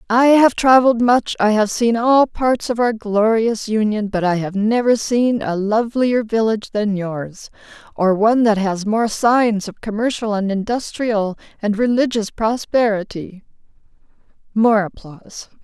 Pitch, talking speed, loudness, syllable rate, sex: 220 Hz, 140 wpm, -17 LUFS, 4.8 syllables/s, female